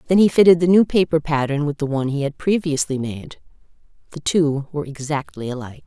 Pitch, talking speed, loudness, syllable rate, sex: 150 Hz, 185 wpm, -19 LUFS, 6.1 syllables/s, female